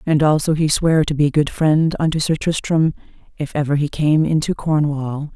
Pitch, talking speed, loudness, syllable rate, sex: 150 Hz, 190 wpm, -18 LUFS, 5.0 syllables/s, female